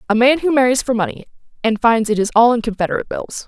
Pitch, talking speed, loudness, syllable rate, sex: 235 Hz, 240 wpm, -16 LUFS, 6.9 syllables/s, female